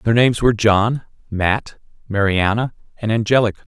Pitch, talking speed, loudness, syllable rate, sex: 110 Hz, 130 wpm, -18 LUFS, 5.2 syllables/s, male